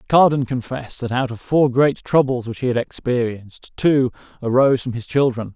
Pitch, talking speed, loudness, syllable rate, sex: 125 Hz, 185 wpm, -19 LUFS, 5.3 syllables/s, male